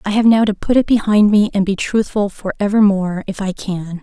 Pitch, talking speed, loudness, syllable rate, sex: 200 Hz, 240 wpm, -16 LUFS, 5.5 syllables/s, female